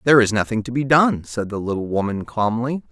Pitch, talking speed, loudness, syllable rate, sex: 115 Hz, 225 wpm, -20 LUFS, 5.9 syllables/s, male